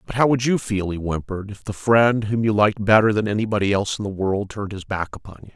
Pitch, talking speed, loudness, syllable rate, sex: 105 Hz, 270 wpm, -21 LUFS, 6.6 syllables/s, male